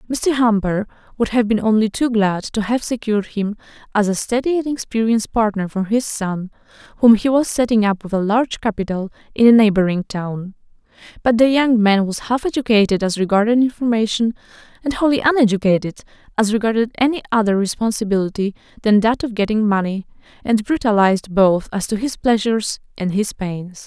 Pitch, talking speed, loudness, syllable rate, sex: 220 Hz, 170 wpm, -18 LUFS, 5.7 syllables/s, female